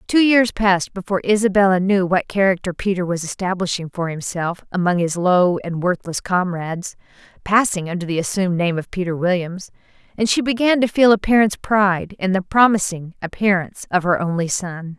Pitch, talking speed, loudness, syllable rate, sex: 190 Hz, 170 wpm, -19 LUFS, 5.5 syllables/s, female